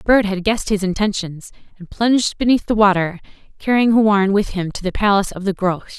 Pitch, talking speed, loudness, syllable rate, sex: 200 Hz, 220 wpm, -17 LUFS, 6.0 syllables/s, female